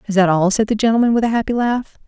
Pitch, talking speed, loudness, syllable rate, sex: 215 Hz, 290 wpm, -16 LUFS, 7.0 syllables/s, female